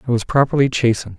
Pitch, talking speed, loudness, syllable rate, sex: 120 Hz, 200 wpm, -17 LUFS, 7.8 syllables/s, male